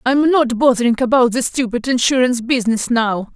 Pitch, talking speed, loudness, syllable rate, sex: 245 Hz, 160 wpm, -16 LUFS, 5.5 syllables/s, female